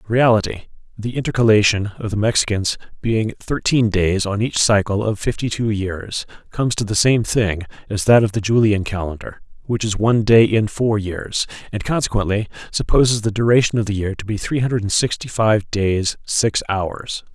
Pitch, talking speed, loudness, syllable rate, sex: 105 Hz, 185 wpm, -18 LUFS, 5.2 syllables/s, male